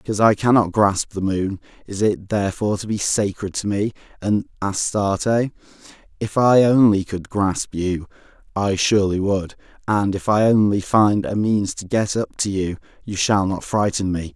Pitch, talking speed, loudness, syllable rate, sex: 100 Hz, 175 wpm, -20 LUFS, 4.8 syllables/s, male